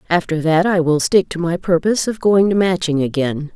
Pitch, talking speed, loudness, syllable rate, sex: 170 Hz, 220 wpm, -16 LUFS, 5.4 syllables/s, female